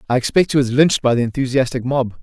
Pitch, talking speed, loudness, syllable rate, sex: 130 Hz, 240 wpm, -17 LUFS, 6.9 syllables/s, male